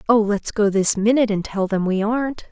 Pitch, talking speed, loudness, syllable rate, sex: 215 Hz, 240 wpm, -19 LUFS, 5.6 syllables/s, female